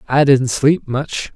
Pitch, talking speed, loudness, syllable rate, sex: 135 Hz, 175 wpm, -16 LUFS, 3.4 syllables/s, male